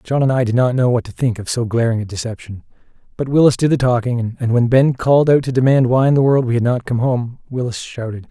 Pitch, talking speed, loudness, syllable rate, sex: 125 Hz, 265 wpm, -16 LUFS, 6.1 syllables/s, male